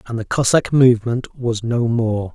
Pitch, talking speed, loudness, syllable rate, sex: 120 Hz, 180 wpm, -18 LUFS, 4.5 syllables/s, male